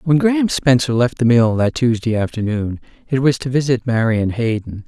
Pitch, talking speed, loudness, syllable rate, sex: 125 Hz, 185 wpm, -17 LUFS, 5.1 syllables/s, male